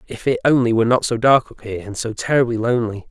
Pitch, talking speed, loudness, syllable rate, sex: 115 Hz, 230 wpm, -18 LUFS, 6.6 syllables/s, male